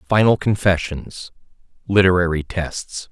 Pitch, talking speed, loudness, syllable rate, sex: 95 Hz, 60 wpm, -19 LUFS, 4.1 syllables/s, male